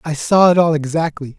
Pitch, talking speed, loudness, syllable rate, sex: 155 Hz, 215 wpm, -15 LUFS, 5.4 syllables/s, male